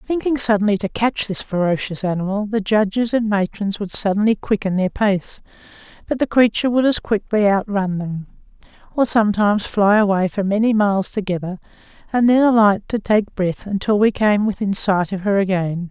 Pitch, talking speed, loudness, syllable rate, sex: 205 Hz, 175 wpm, -18 LUFS, 5.3 syllables/s, female